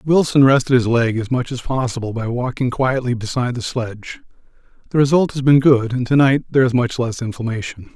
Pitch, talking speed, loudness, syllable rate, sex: 125 Hz, 205 wpm, -17 LUFS, 5.8 syllables/s, male